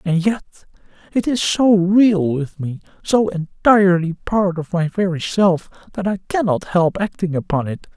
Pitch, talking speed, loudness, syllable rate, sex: 185 Hz, 165 wpm, -18 LUFS, 4.2 syllables/s, male